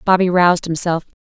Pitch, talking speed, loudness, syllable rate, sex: 175 Hz, 145 wpm, -16 LUFS, 6.1 syllables/s, female